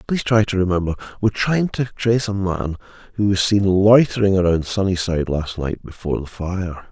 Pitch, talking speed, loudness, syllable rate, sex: 95 Hz, 190 wpm, -19 LUFS, 5.8 syllables/s, male